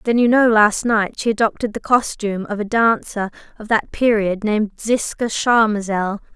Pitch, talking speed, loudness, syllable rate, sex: 215 Hz, 170 wpm, -18 LUFS, 4.9 syllables/s, female